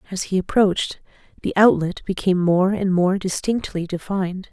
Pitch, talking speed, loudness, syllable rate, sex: 185 Hz, 145 wpm, -20 LUFS, 5.2 syllables/s, female